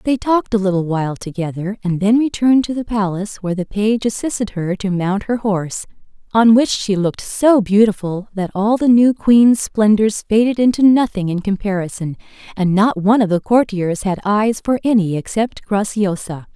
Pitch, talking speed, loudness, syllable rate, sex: 210 Hz, 180 wpm, -16 LUFS, 5.2 syllables/s, female